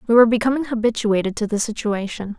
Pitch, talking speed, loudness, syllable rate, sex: 225 Hz, 175 wpm, -20 LUFS, 6.7 syllables/s, female